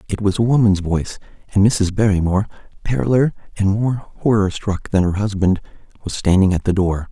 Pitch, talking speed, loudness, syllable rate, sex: 100 Hz, 175 wpm, -18 LUFS, 5.4 syllables/s, male